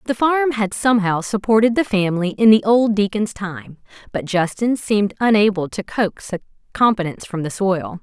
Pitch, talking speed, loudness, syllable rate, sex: 205 Hz, 170 wpm, -18 LUFS, 5.2 syllables/s, female